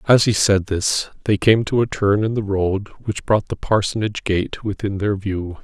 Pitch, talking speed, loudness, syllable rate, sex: 100 Hz, 215 wpm, -19 LUFS, 4.5 syllables/s, male